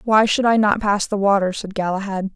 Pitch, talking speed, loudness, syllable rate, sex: 205 Hz, 230 wpm, -19 LUFS, 5.4 syllables/s, female